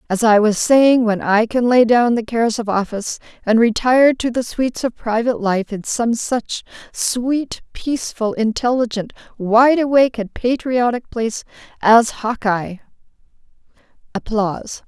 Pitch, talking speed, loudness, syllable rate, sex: 230 Hz, 140 wpm, -17 LUFS, 4.6 syllables/s, female